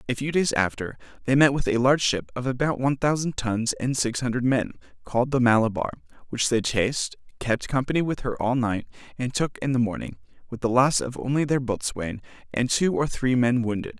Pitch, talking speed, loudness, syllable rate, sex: 125 Hz, 210 wpm, -24 LUFS, 5.6 syllables/s, male